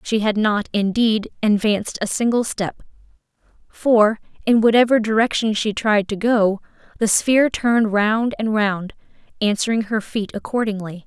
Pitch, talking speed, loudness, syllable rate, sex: 215 Hz, 140 wpm, -19 LUFS, 4.7 syllables/s, female